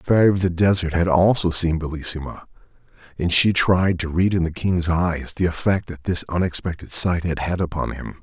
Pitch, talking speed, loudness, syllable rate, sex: 85 Hz, 205 wpm, -20 LUFS, 5.3 syllables/s, male